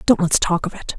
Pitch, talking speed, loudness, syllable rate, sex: 185 Hz, 305 wpm, -19 LUFS, 5.6 syllables/s, female